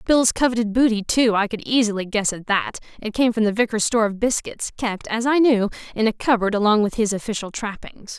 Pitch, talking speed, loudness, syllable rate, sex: 220 Hz, 220 wpm, -20 LUFS, 5.7 syllables/s, female